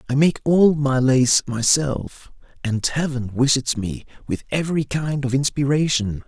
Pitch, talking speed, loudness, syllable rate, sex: 135 Hz, 145 wpm, -20 LUFS, 4.3 syllables/s, male